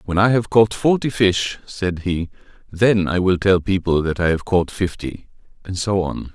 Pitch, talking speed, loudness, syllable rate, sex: 95 Hz, 200 wpm, -19 LUFS, 4.5 syllables/s, male